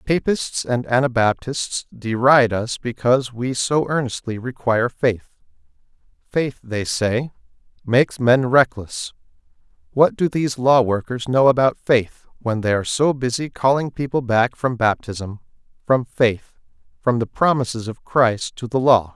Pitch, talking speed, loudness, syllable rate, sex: 125 Hz, 140 wpm, -19 LUFS, 4.4 syllables/s, male